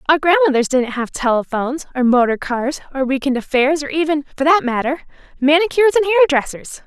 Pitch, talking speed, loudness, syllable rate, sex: 285 Hz, 165 wpm, -16 LUFS, 5.8 syllables/s, female